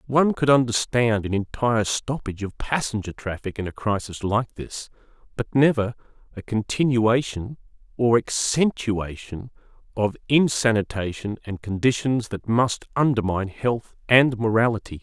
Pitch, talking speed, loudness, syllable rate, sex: 115 Hz, 120 wpm, -23 LUFS, 4.7 syllables/s, male